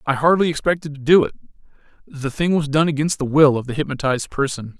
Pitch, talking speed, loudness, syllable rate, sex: 145 Hz, 215 wpm, -19 LUFS, 6.4 syllables/s, male